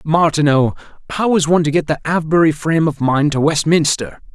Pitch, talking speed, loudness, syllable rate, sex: 155 Hz, 180 wpm, -15 LUFS, 6.0 syllables/s, male